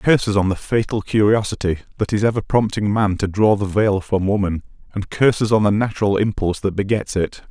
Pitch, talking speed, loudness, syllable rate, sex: 105 Hz, 200 wpm, -19 LUFS, 5.6 syllables/s, male